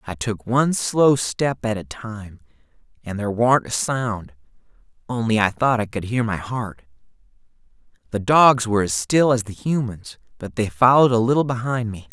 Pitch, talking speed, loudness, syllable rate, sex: 115 Hz, 180 wpm, -20 LUFS, 4.9 syllables/s, male